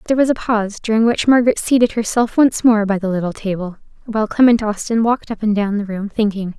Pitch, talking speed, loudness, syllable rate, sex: 215 Hz, 230 wpm, -17 LUFS, 6.4 syllables/s, female